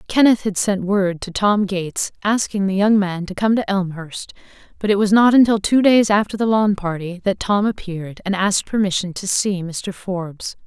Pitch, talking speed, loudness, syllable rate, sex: 195 Hz, 205 wpm, -18 LUFS, 5.0 syllables/s, female